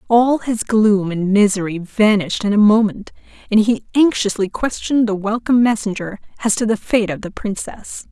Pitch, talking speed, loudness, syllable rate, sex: 210 Hz, 170 wpm, -17 LUFS, 5.2 syllables/s, female